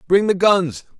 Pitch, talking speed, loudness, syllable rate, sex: 180 Hz, 180 wpm, -16 LUFS, 3.8 syllables/s, male